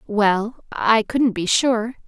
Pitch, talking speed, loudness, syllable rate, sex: 220 Hz, 145 wpm, -19 LUFS, 2.9 syllables/s, female